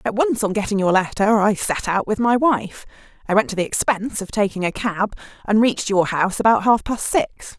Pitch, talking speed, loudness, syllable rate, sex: 205 Hz, 230 wpm, -19 LUFS, 5.5 syllables/s, female